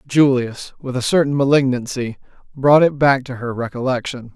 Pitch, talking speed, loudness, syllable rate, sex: 130 Hz, 150 wpm, -18 LUFS, 5.1 syllables/s, male